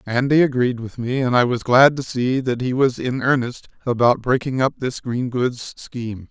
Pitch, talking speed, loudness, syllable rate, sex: 125 Hz, 210 wpm, -19 LUFS, 4.7 syllables/s, male